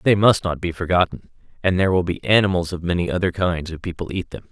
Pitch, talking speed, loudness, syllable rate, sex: 90 Hz, 240 wpm, -20 LUFS, 6.4 syllables/s, male